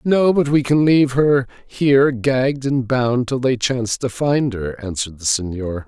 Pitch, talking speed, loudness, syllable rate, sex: 125 Hz, 195 wpm, -18 LUFS, 4.7 syllables/s, male